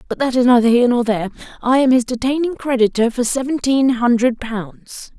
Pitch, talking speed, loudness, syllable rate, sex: 245 Hz, 185 wpm, -16 LUFS, 5.6 syllables/s, female